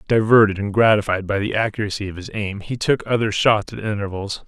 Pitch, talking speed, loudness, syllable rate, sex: 105 Hz, 200 wpm, -19 LUFS, 5.8 syllables/s, male